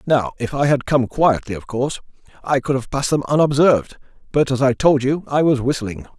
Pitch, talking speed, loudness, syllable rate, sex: 130 Hz, 215 wpm, -18 LUFS, 5.7 syllables/s, male